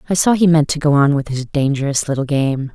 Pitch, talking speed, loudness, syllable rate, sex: 145 Hz, 265 wpm, -16 LUFS, 5.8 syllables/s, female